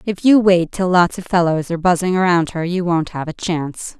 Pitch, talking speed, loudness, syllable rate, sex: 175 Hz, 240 wpm, -17 LUFS, 5.4 syllables/s, female